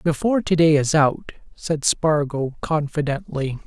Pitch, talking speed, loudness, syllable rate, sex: 150 Hz, 115 wpm, -20 LUFS, 4.2 syllables/s, male